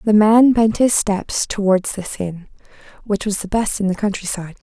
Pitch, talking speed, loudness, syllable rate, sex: 205 Hz, 205 wpm, -17 LUFS, 4.6 syllables/s, female